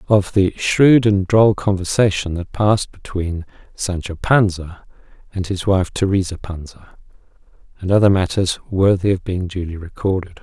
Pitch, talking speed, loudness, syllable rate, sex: 95 Hz, 140 wpm, -18 LUFS, 4.7 syllables/s, male